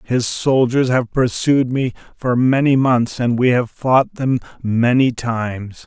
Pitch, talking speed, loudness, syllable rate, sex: 125 Hz, 155 wpm, -17 LUFS, 3.7 syllables/s, male